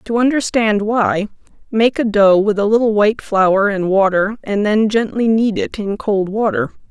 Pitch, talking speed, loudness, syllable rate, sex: 210 Hz, 185 wpm, -15 LUFS, 4.5 syllables/s, female